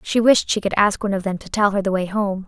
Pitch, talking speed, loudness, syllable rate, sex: 200 Hz, 340 wpm, -19 LUFS, 6.3 syllables/s, female